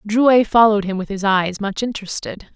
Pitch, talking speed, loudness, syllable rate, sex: 210 Hz, 190 wpm, -17 LUFS, 5.3 syllables/s, female